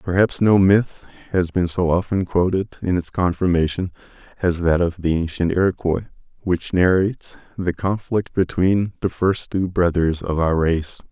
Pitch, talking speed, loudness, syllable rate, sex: 90 Hz, 155 wpm, -20 LUFS, 4.6 syllables/s, male